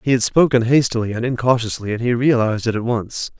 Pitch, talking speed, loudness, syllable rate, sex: 120 Hz, 210 wpm, -18 LUFS, 6.2 syllables/s, male